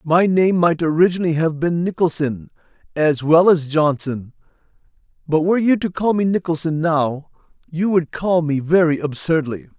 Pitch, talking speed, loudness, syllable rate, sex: 160 Hz, 155 wpm, -18 LUFS, 4.9 syllables/s, male